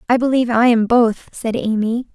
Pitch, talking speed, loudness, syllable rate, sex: 235 Hz, 195 wpm, -16 LUFS, 5.3 syllables/s, female